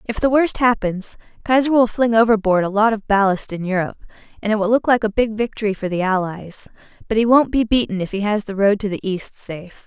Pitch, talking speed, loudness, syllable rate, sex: 215 Hz, 235 wpm, -18 LUFS, 5.9 syllables/s, female